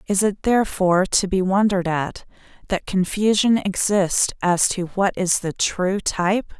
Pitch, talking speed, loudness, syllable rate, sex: 190 Hz, 155 wpm, -20 LUFS, 4.4 syllables/s, female